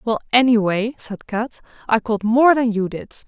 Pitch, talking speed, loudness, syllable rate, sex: 225 Hz, 185 wpm, -18 LUFS, 4.5 syllables/s, female